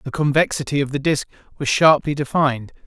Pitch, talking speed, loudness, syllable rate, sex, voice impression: 140 Hz, 170 wpm, -19 LUFS, 6.0 syllables/s, male, very masculine, very adult-like, very middle-aged, thick, slightly tensed, powerful, bright, hard, slightly clear, fluent, slightly cool, intellectual, very sincere, slightly calm, mature, slightly friendly, reassuring, slightly unique, slightly wild, slightly lively, slightly kind, slightly intense, slightly modest